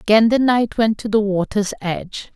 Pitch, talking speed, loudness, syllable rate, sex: 210 Hz, 205 wpm, -18 LUFS, 4.9 syllables/s, female